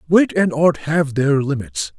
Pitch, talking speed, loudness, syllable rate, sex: 145 Hz, 180 wpm, -18 LUFS, 3.9 syllables/s, male